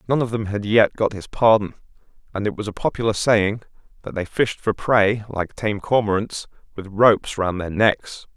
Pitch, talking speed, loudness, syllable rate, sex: 105 Hz, 195 wpm, -20 LUFS, 4.8 syllables/s, male